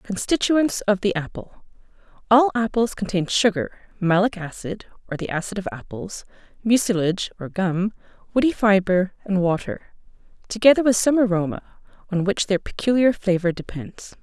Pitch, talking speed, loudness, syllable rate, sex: 200 Hz, 130 wpm, -21 LUFS, 5.1 syllables/s, female